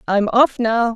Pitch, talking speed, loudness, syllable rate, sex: 230 Hz, 190 wpm, -16 LUFS, 3.7 syllables/s, female